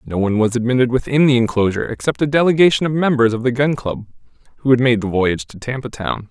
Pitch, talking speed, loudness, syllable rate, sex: 125 Hz, 230 wpm, -17 LUFS, 6.7 syllables/s, male